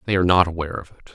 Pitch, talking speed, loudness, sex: 85 Hz, 315 wpm, -20 LUFS, male